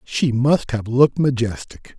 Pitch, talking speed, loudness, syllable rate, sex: 125 Hz, 150 wpm, -18 LUFS, 4.2 syllables/s, male